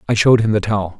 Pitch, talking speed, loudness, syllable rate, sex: 110 Hz, 300 wpm, -15 LUFS, 8.6 syllables/s, male